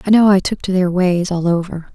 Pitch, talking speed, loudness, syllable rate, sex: 185 Hz, 280 wpm, -15 LUFS, 5.5 syllables/s, female